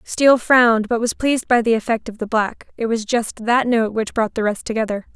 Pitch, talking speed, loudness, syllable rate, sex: 230 Hz, 235 wpm, -18 LUFS, 5.5 syllables/s, female